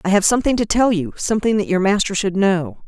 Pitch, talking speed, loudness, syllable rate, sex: 195 Hz, 230 wpm, -18 LUFS, 6.3 syllables/s, female